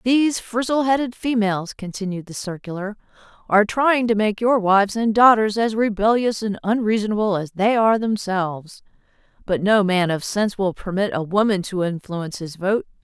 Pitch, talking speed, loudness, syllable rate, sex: 210 Hz, 165 wpm, -20 LUFS, 5.4 syllables/s, female